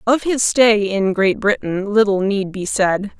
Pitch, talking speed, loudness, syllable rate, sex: 205 Hz, 190 wpm, -17 LUFS, 4.0 syllables/s, female